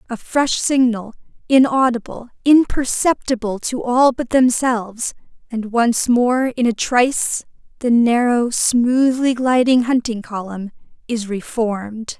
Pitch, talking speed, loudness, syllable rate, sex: 240 Hz, 115 wpm, -17 LUFS, 3.9 syllables/s, female